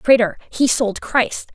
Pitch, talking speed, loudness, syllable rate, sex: 235 Hz, 155 wpm, -18 LUFS, 3.6 syllables/s, female